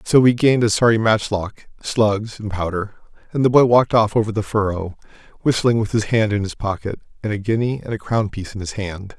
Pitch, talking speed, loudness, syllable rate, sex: 105 Hz, 220 wpm, -19 LUFS, 5.7 syllables/s, male